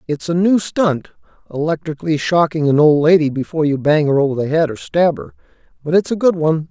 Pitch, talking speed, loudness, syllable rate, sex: 160 Hz, 205 wpm, -16 LUFS, 6.1 syllables/s, male